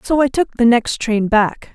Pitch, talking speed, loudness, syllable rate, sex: 240 Hz, 240 wpm, -16 LUFS, 4.3 syllables/s, female